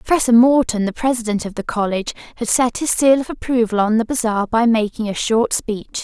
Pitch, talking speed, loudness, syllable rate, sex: 230 Hz, 210 wpm, -17 LUFS, 5.8 syllables/s, female